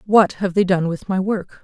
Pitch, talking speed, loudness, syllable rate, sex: 190 Hz, 255 wpm, -19 LUFS, 5.0 syllables/s, female